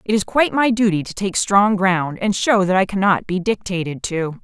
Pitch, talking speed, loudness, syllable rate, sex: 195 Hz, 230 wpm, -18 LUFS, 5.1 syllables/s, female